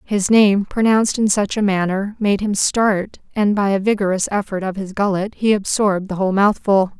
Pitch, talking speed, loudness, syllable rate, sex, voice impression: 200 Hz, 195 wpm, -17 LUFS, 5.1 syllables/s, female, very feminine, adult-like, slightly clear, slightly calm, slightly elegant, slightly kind